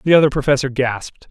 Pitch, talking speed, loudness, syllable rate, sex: 135 Hz, 185 wpm, -17 LUFS, 6.8 syllables/s, male